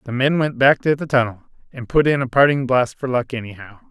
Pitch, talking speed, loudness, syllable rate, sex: 130 Hz, 245 wpm, -18 LUFS, 5.9 syllables/s, male